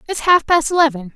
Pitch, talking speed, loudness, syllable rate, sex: 300 Hz, 210 wpm, -15 LUFS, 6.2 syllables/s, female